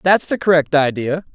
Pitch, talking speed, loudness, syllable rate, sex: 165 Hz, 180 wpm, -16 LUFS, 5.2 syllables/s, male